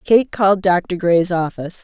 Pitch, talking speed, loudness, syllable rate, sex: 185 Hz, 165 wpm, -17 LUFS, 4.6 syllables/s, female